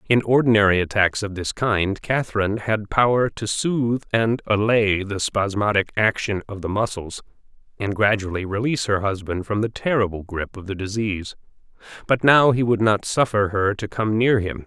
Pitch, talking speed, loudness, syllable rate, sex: 105 Hz, 170 wpm, -21 LUFS, 5.2 syllables/s, male